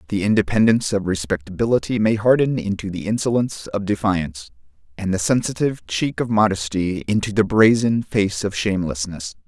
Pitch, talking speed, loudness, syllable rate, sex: 105 Hz, 145 wpm, -20 LUFS, 5.7 syllables/s, male